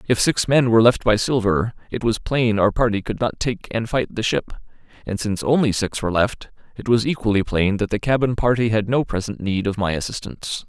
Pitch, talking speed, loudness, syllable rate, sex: 110 Hz, 225 wpm, -20 LUFS, 5.6 syllables/s, male